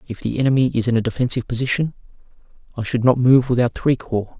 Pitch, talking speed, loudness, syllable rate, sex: 120 Hz, 205 wpm, -19 LUFS, 6.7 syllables/s, male